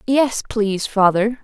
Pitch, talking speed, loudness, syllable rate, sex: 220 Hz, 125 wpm, -18 LUFS, 4.1 syllables/s, female